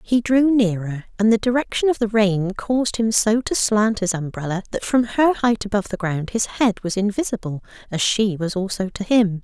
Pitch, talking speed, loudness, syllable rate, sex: 210 Hz, 210 wpm, -20 LUFS, 5.1 syllables/s, female